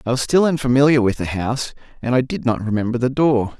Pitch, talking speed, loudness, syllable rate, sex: 125 Hz, 235 wpm, -18 LUFS, 6.3 syllables/s, male